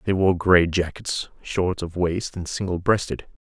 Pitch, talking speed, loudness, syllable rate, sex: 90 Hz, 175 wpm, -23 LUFS, 4.2 syllables/s, male